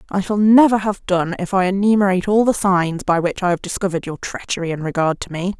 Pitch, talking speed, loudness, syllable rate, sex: 190 Hz, 235 wpm, -18 LUFS, 6.1 syllables/s, female